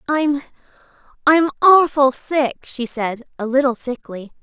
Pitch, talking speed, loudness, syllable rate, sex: 270 Hz, 110 wpm, -18 LUFS, 4.1 syllables/s, female